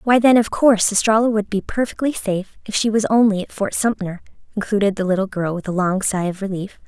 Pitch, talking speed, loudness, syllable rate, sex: 205 Hz, 225 wpm, -19 LUFS, 6.0 syllables/s, female